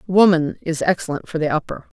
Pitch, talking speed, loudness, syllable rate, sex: 175 Hz, 180 wpm, -19 LUFS, 5.8 syllables/s, female